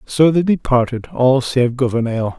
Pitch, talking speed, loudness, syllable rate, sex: 130 Hz, 150 wpm, -16 LUFS, 4.5 syllables/s, male